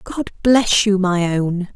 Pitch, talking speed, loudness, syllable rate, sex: 195 Hz, 170 wpm, -17 LUFS, 3.3 syllables/s, female